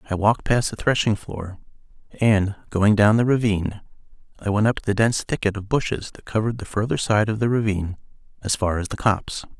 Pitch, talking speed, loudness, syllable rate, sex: 105 Hz, 205 wpm, -22 LUFS, 6.1 syllables/s, male